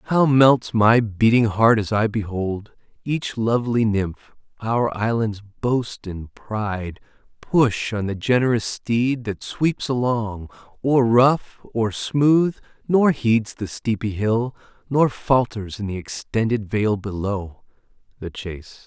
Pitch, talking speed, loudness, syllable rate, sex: 115 Hz, 135 wpm, -21 LUFS, 3.7 syllables/s, male